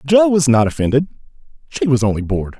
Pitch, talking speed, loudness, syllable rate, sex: 135 Hz, 185 wpm, -16 LUFS, 6.4 syllables/s, male